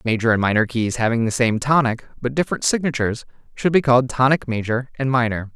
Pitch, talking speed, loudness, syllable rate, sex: 125 Hz, 195 wpm, -19 LUFS, 6.2 syllables/s, male